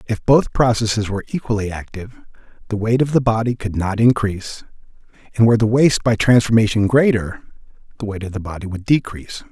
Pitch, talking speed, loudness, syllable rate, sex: 110 Hz, 175 wpm, -17 LUFS, 6.3 syllables/s, male